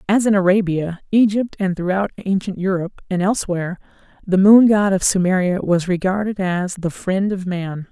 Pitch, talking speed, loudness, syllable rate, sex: 190 Hz, 165 wpm, -18 LUFS, 5.3 syllables/s, female